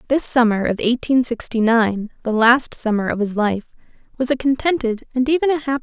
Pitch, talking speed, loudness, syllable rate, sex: 245 Hz, 185 wpm, -18 LUFS, 6.1 syllables/s, female